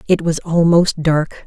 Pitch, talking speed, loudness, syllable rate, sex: 165 Hz, 165 wpm, -15 LUFS, 3.9 syllables/s, female